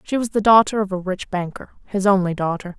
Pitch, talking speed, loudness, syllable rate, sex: 195 Hz, 215 wpm, -19 LUFS, 5.7 syllables/s, female